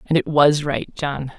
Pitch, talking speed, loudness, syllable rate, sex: 145 Hz, 215 wpm, -19 LUFS, 4.0 syllables/s, female